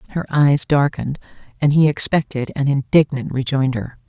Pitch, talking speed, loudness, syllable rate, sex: 140 Hz, 130 wpm, -18 LUFS, 5.3 syllables/s, female